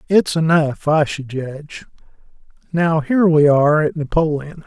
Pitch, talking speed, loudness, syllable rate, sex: 155 Hz, 140 wpm, -17 LUFS, 4.7 syllables/s, male